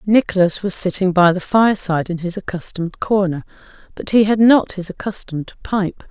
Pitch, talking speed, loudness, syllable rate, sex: 190 Hz, 175 wpm, -17 LUFS, 5.2 syllables/s, female